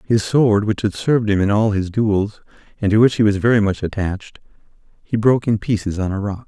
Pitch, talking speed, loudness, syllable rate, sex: 105 Hz, 230 wpm, -18 LUFS, 5.8 syllables/s, male